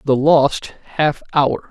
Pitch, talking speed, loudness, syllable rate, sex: 145 Hz, 140 wpm, -16 LUFS, 2.7 syllables/s, male